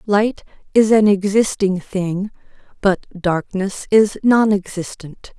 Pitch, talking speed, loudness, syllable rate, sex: 200 Hz, 100 wpm, -17 LUFS, 3.5 syllables/s, female